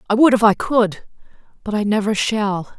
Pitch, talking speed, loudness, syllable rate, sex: 215 Hz, 195 wpm, -17 LUFS, 5.0 syllables/s, female